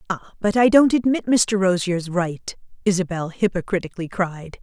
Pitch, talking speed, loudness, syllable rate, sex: 190 Hz, 145 wpm, -20 LUFS, 4.9 syllables/s, female